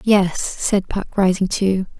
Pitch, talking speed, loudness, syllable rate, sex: 190 Hz, 150 wpm, -19 LUFS, 3.5 syllables/s, female